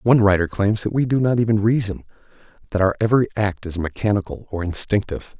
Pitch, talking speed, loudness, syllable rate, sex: 105 Hz, 180 wpm, -20 LUFS, 6.4 syllables/s, male